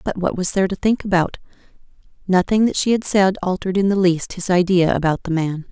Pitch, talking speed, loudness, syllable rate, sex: 185 Hz, 220 wpm, -18 LUFS, 6.0 syllables/s, female